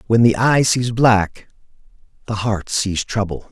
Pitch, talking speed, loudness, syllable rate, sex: 110 Hz, 155 wpm, -17 LUFS, 3.9 syllables/s, male